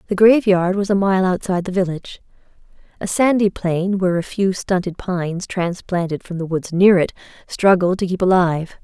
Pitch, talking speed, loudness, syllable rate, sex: 185 Hz, 170 wpm, -18 LUFS, 5.3 syllables/s, female